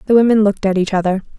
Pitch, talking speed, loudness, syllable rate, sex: 200 Hz, 260 wpm, -15 LUFS, 7.4 syllables/s, female